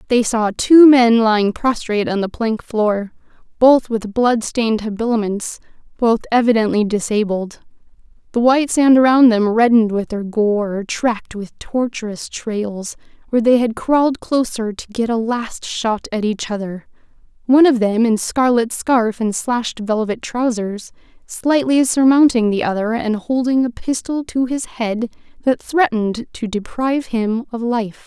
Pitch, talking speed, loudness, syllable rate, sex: 230 Hz, 150 wpm, -17 LUFS, 4.5 syllables/s, female